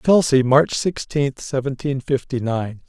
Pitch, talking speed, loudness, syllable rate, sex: 135 Hz, 125 wpm, -20 LUFS, 4.0 syllables/s, male